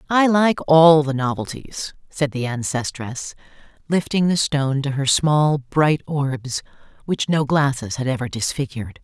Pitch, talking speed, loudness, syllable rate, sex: 145 Hz, 145 wpm, -20 LUFS, 4.3 syllables/s, female